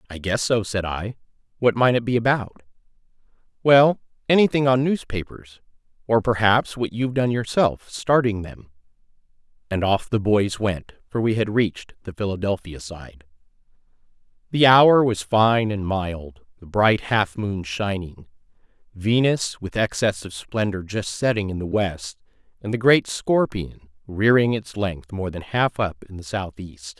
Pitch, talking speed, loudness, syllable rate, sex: 105 Hz, 155 wpm, -21 LUFS, 4.3 syllables/s, male